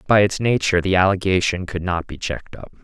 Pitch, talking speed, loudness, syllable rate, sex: 95 Hz, 210 wpm, -20 LUFS, 6.2 syllables/s, male